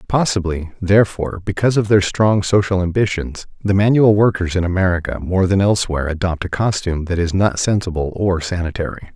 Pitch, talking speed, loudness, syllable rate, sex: 95 Hz, 165 wpm, -17 LUFS, 5.9 syllables/s, male